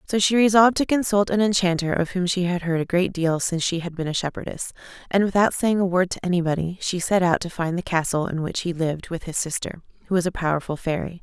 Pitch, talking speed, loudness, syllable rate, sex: 180 Hz, 250 wpm, -22 LUFS, 6.3 syllables/s, female